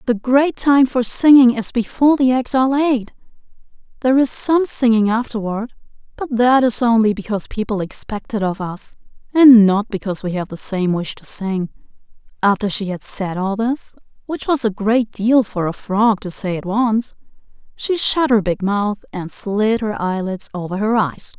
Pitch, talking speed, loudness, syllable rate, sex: 220 Hz, 185 wpm, -17 LUFS, 4.7 syllables/s, female